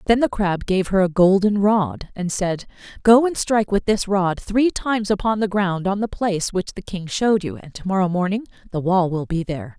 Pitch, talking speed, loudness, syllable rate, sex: 195 Hz, 235 wpm, -20 LUFS, 5.3 syllables/s, female